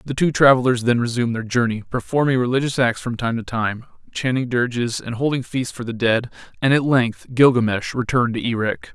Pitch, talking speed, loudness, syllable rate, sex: 120 Hz, 195 wpm, -20 LUFS, 5.8 syllables/s, male